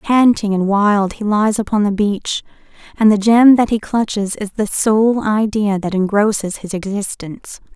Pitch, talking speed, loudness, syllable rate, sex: 210 Hz, 170 wpm, -15 LUFS, 4.5 syllables/s, female